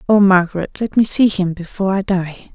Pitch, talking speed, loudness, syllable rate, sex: 190 Hz, 210 wpm, -16 LUFS, 5.5 syllables/s, female